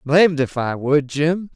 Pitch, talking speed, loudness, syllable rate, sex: 150 Hz, 195 wpm, -19 LUFS, 4.2 syllables/s, male